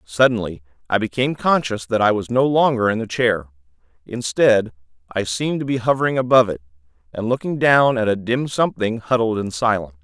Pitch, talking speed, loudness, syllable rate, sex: 110 Hz, 180 wpm, -19 LUFS, 5.8 syllables/s, male